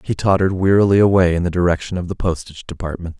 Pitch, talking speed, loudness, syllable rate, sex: 90 Hz, 205 wpm, -17 LUFS, 7.1 syllables/s, male